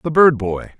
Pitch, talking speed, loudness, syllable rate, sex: 135 Hz, 225 wpm, -16 LUFS, 4.8 syllables/s, male